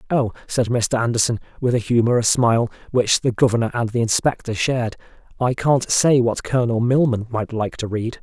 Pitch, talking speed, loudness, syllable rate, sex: 120 Hz, 180 wpm, -19 LUFS, 5.5 syllables/s, male